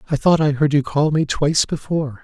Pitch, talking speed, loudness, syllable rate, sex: 150 Hz, 240 wpm, -18 LUFS, 6.0 syllables/s, male